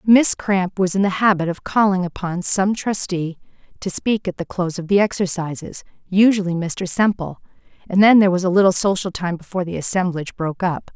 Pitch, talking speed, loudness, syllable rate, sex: 185 Hz, 180 wpm, -19 LUFS, 5.6 syllables/s, female